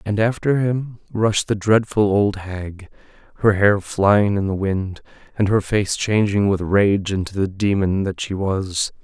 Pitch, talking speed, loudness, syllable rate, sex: 100 Hz, 175 wpm, -19 LUFS, 4.0 syllables/s, male